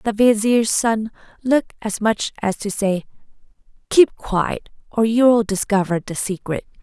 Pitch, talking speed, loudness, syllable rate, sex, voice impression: 220 Hz, 140 wpm, -19 LUFS, 4.1 syllables/s, female, feminine, adult-like, slightly relaxed, slightly powerful, bright, soft, halting, raspy, slightly calm, friendly, reassuring, slightly lively, kind